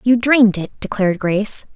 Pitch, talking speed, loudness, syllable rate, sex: 215 Hz, 170 wpm, -16 LUFS, 6.0 syllables/s, female